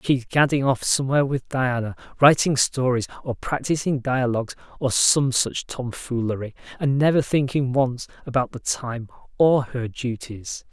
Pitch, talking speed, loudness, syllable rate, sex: 130 Hz, 140 wpm, -22 LUFS, 4.6 syllables/s, male